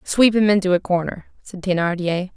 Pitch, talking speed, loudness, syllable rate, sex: 185 Hz, 180 wpm, -19 LUFS, 5.3 syllables/s, female